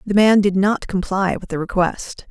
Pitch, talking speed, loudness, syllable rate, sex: 195 Hz, 210 wpm, -18 LUFS, 4.6 syllables/s, female